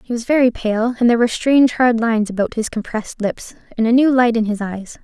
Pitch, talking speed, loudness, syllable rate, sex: 230 Hz, 250 wpm, -17 LUFS, 6.2 syllables/s, female